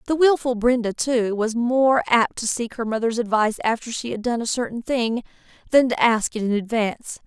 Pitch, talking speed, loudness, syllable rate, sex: 235 Hz, 205 wpm, -21 LUFS, 5.2 syllables/s, female